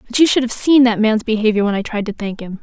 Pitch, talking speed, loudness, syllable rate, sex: 225 Hz, 320 wpm, -16 LUFS, 6.4 syllables/s, female